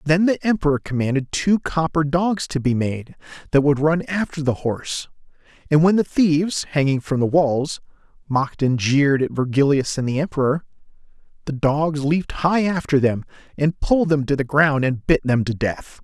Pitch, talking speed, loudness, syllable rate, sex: 145 Hz, 185 wpm, -20 LUFS, 5.0 syllables/s, male